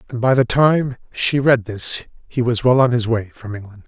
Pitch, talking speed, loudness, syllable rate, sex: 120 Hz, 230 wpm, -18 LUFS, 4.9 syllables/s, male